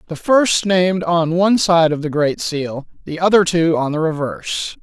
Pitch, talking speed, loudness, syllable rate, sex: 170 Hz, 200 wpm, -16 LUFS, 4.8 syllables/s, male